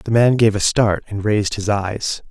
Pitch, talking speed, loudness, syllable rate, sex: 105 Hz, 235 wpm, -18 LUFS, 4.7 syllables/s, male